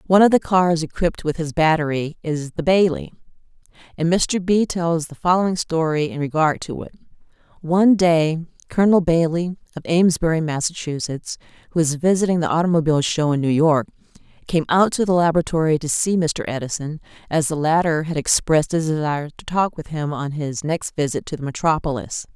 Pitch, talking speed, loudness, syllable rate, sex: 160 Hz, 175 wpm, -20 LUFS, 5.7 syllables/s, female